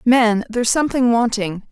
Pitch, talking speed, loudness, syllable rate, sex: 230 Hz, 140 wpm, -17 LUFS, 5.1 syllables/s, female